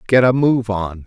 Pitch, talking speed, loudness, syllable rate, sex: 110 Hz, 225 wpm, -16 LUFS, 4.4 syllables/s, male